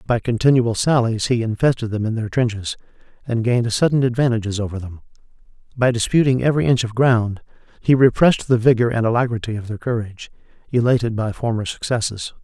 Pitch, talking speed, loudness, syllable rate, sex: 115 Hz, 165 wpm, -19 LUFS, 6.2 syllables/s, male